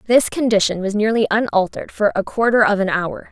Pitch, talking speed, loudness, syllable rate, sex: 210 Hz, 200 wpm, -18 LUFS, 5.8 syllables/s, female